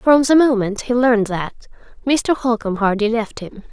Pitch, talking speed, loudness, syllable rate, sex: 230 Hz, 175 wpm, -17 LUFS, 5.1 syllables/s, female